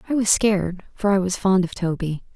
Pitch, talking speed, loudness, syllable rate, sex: 190 Hz, 230 wpm, -21 LUFS, 5.6 syllables/s, female